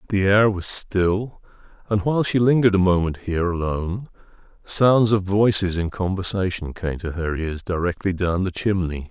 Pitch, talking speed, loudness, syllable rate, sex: 95 Hz, 165 wpm, -21 LUFS, 5.0 syllables/s, male